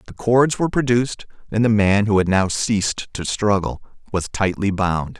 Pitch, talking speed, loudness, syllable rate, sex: 105 Hz, 185 wpm, -19 LUFS, 4.9 syllables/s, male